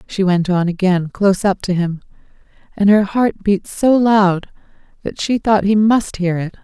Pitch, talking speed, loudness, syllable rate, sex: 195 Hz, 190 wpm, -16 LUFS, 4.4 syllables/s, female